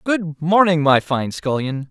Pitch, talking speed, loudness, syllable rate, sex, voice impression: 155 Hz, 160 wpm, -18 LUFS, 4.0 syllables/s, male, very masculine, very adult-like, slightly middle-aged, slightly thick, very tensed, very powerful, slightly dark, hard, clear, fluent, very cool, very intellectual, slightly refreshing, sincere, slightly calm, friendly, reassuring, very unique, very wild, sweet, very lively, very strict, intense